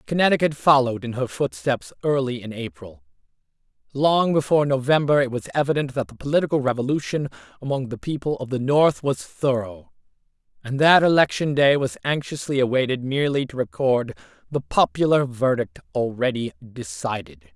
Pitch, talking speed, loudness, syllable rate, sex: 135 Hz, 140 wpm, -22 LUFS, 5.5 syllables/s, male